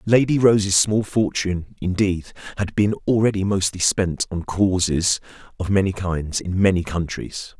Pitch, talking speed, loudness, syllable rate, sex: 95 Hz, 140 wpm, -21 LUFS, 4.5 syllables/s, male